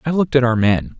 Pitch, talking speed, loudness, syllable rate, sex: 120 Hz, 300 wpm, -16 LUFS, 6.7 syllables/s, male